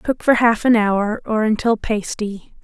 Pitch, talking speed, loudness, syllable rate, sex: 220 Hz, 180 wpm, -18 LUFS, 4.0 syllables/s, female